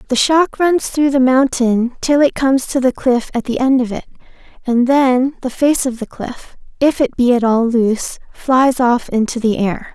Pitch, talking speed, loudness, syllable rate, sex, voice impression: 255 Hz, 210 wpm, -15 LUFS, 4.5 syllables/s, female, very feminine, very young, very thin, slightly tensed, slightly weak, very bright, very soft, very clear, very fluent, slightly raspy, very cute, intellectual, very refreshing, sincere, very calm, very friendly, very reassuring, very unique, very elegant, very sweet, slightly lively, very kind, slightly intense, slightly sharp, modest, very light